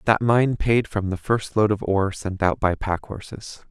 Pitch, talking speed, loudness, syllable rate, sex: 105 Hz, 225 wpm, -22 LUFS, 4.5 syllables/s, male